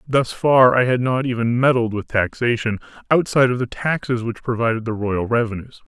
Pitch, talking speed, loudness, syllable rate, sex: 120 Hz, 180 wpm, -19 LUFS, 5.4 syllables/s, male